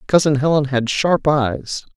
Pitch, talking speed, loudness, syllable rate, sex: 140 Hz, 155 wpm, -17 LUFS, 4.0 syllables/s, male